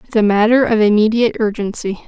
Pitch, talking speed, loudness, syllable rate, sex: 215 Hz, 175 wpm, -14 LUFS, 6.4 syllables/s, female